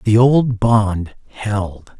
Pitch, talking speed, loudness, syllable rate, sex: 110 Hz, 120 wpm, -16 LUFS, 2.3 syllables/s, male